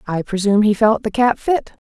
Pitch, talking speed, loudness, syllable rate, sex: 220 Hz, 225 wpm, -17 LUFS, 5.6 syllables/s, female